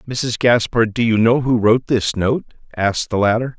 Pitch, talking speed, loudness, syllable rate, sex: 115 Hz, 200 wpm, -17 LUFS, 5.1 syllables/s, male